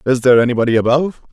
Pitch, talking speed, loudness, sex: 125 Hz, 180 wpm, -14 LUFS, male